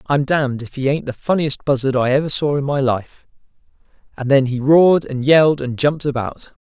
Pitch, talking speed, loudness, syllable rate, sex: 140 Hz, 210 wpm, -17 LUFS, 5.6 syllables/s, male